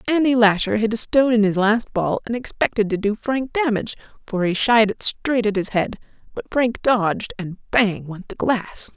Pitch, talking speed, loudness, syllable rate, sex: 220 Hz, 210 wpm, -20 LUFS, 4.9 syllables/s, female